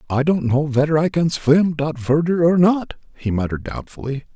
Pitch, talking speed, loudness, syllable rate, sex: 150 Hz, 195 wpm, -19 LUFS, 5.2 syllables/s, male